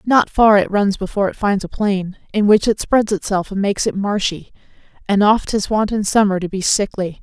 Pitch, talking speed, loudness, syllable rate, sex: 200 Hz, 225 wpm, -17 LUFS, 5.3 syllables/s, female